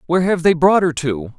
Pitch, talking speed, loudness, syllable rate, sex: 165 Hz, 260 wpm, -16 LUFS, 5.7 syllables/s, male